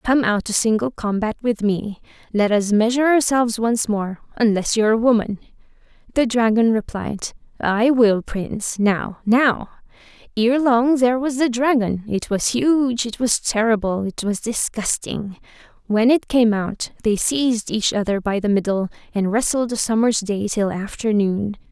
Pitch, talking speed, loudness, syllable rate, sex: 225 Hz, 160 wpm, -19 LUFS, 4.6 syllables/s, female